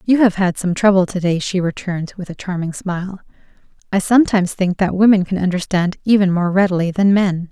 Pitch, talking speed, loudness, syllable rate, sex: 185 Hz, 200 wpm, -17 LUFS, 5.9 syllables/s, female